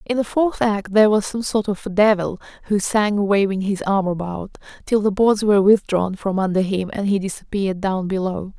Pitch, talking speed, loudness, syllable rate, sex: 200 Hz, 205 wpm, -19 LUFS, 5.1 syllables/s, female